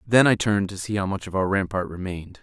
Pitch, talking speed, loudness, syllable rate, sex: 100 Hz, 275 wpm, -23 LUFS, 6.5 syllables/s, male